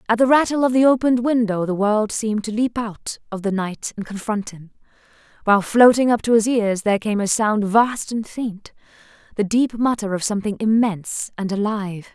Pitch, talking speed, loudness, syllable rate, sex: 220 Hz, 200 wpm, -19 LUFS, 5.4 syllables/s, female